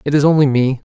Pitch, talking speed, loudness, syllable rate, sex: 140 Hz, 265 wpm, -14 LUFS, 6.9 syllables/s, male